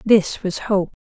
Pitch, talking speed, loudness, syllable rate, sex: 200 Hz, 175 wpm, -20 LUFS, 3.5 syllables/s, female